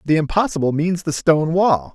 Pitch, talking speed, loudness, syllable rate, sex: 155 Hz, 185 wpm, -18 LUFS, 5.4 syllables/s, male